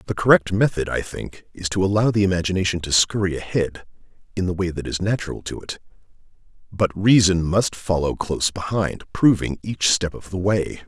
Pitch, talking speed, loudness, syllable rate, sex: 90 Hz, 180 wpm, -21 LUFS, 5.4 syllables/s, male